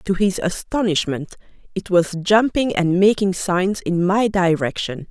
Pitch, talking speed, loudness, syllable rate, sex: 190 Hz, 140 wpm, -19 LUFS, 4.1 syllables/s, female